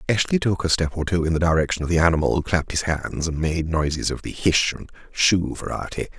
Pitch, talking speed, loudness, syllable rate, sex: 85 Hz, 235 wpm, -22 LUFS, 5.8 syllables/s, male